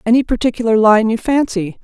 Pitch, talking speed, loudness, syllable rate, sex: 225 Hz, 165 wpm, -14 LUFS, 6.0 syllables/s, female